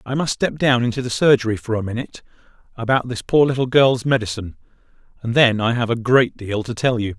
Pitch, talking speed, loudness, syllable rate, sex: 120 Hz, 215 wpm, -19 LUFS, 6.1 syllables/s, male